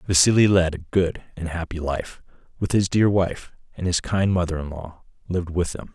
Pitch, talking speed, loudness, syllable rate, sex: 90 Hz, 200 wpm, -22 LUFS, 5.1 syllables/s, male